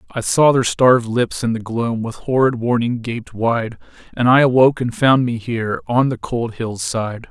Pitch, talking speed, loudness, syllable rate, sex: 120 Hz, 205 wpm, -17 LUFS, 4.6 syllables/s, male